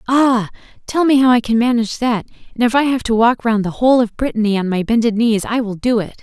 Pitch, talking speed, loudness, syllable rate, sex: 230 Hz, 260 wpm, -16 LUFS, 6.2 syllables/s, female